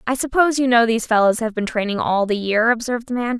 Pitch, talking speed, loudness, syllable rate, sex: 235 Hz, 265 wpm, -18 LUFS, 6.8 syllables/s, female